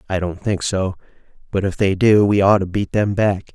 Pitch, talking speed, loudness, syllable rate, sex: 95 Hz, 235 wpm, -18 LUFS, 5.0 syllables/s, male